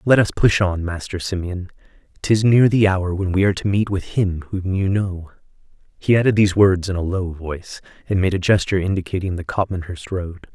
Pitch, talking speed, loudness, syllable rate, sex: 95 Hz, 205 wpm, -19 LUFS, 5.6 syllables/s, male